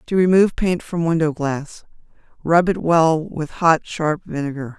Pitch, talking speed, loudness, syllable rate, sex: 165 Hz, 150 wpm, -19 LUFS, 4.4 syllables/s, female